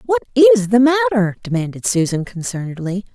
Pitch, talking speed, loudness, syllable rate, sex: 200 Hz, 135 wpm, -16 LUFS, 5.9 syllables/s, female